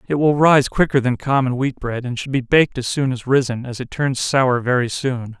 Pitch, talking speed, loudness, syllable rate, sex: 130 Hz, 245 wpm, -18 LUFS, 5.2 syllables/s, male